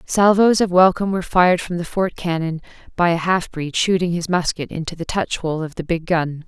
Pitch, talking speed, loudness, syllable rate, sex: 175 Hz, 220 wpm, -19 LUFS, 5.5 syllables/s, female